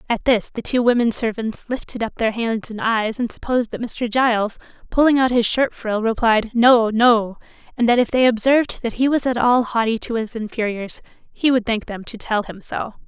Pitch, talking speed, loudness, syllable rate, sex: 230 Hz, 215 wpm, -19 LUFS, 5.1 syllables/s, female